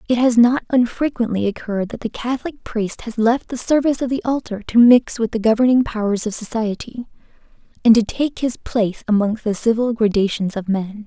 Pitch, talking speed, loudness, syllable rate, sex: 230 Hz, 190 wpm, -18 LUFS, 5.5 syllables/s, female